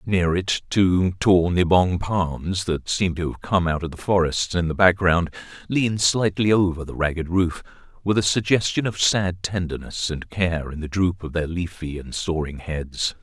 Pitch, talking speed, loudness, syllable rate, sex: 90 Hz, 185 wpm, -22 LUFS, 4.5 syllables/s, male